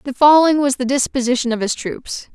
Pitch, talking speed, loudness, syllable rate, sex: 260 Hz, 205 wpm, -16 LUFS, 6.0 syllables/s, female